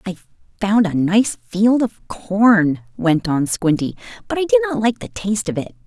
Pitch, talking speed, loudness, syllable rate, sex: 210 Hz, 195 wpm, -18 LUFS, 4.8 syllables/s, female